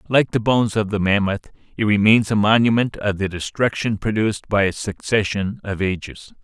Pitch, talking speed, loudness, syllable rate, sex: 105 Hz, 175 wpm, -19 LUFS, 5.3 syllables/s, male